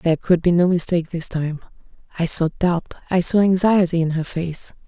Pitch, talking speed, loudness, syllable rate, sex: 170 Hz, 195 wpm, -19 LUFS, 5.5 syllables/s, female